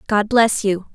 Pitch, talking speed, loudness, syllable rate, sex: 210 Hz, 190 wpm, -17 LUFS, 4.0 syllables/s, female